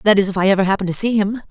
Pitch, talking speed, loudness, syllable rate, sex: 200 Hz, 360 wpm, -17 LUFS, 8.2 syllables/s, female